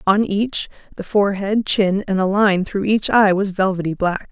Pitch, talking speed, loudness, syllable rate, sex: 195 Hz, 195 wpm, -18 LUFS, 4.6 syllables/s, female